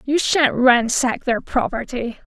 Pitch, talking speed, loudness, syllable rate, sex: 255 Hz, 130 wpm, -18 LUFS, 3.8 syllables/s, female